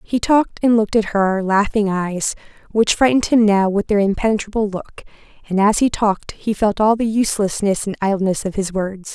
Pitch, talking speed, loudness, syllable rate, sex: 205 Hz, 195 wpm, -18 LUFS, 5.5 syllables/s, female